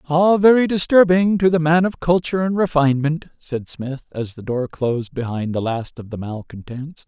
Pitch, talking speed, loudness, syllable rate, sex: 150 Hz, 185 wpm, -19 LUFS, 5.0 syllables/s, male